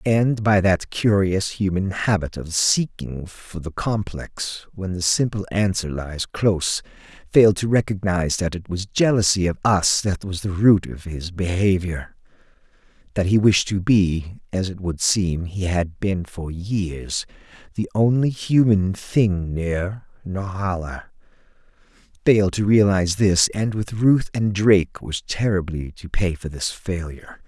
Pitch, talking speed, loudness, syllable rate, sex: 95 Hz, 150 wpm, -21 LUFS, 4.1 syllables/s, male